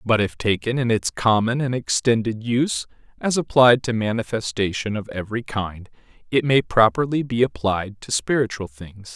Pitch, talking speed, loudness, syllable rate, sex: 115 Hz, 155 wpm, -21 LUFS, 4.9 syllables/s, male